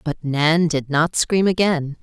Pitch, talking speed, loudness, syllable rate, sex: 160 Hz, 180 wpm, -19 LUFS, 3.7 syllables/s, female